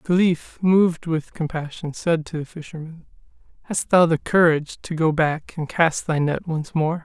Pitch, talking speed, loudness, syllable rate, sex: 160 Hz, 190 wpm, -21 LUFS, 5.0 syllables/s, male